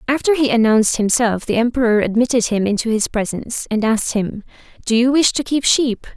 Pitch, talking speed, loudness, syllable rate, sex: 235 Hz, 195 wpm, -17 LUFS, 5.8 syllables/s, female